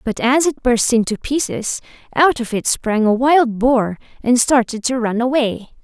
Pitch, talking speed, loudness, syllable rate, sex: 245 Hz, 185 wpm, -17 LUFS, 4.6 syllables/s, female